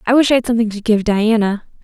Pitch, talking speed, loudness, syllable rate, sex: 225 Hz, 260 wpm, -15 LUFS, 7.1 syllables/s, female